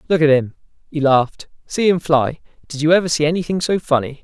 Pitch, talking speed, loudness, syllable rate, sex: 155 Hz, 215 wpm, -17 LUFS, 6.1 syllables/s, male